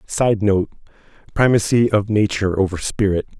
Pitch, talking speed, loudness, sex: 105 Hz, 105 wpm, -18 LUFS, male